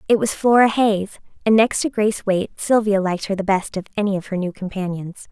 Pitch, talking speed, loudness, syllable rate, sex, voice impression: 200 Hz, 225 wpm, -19 LUFS, 6.0 syllables/s, female, slightly feminine, young, slightly bright, clear, slightly fluent, cute, slightly unique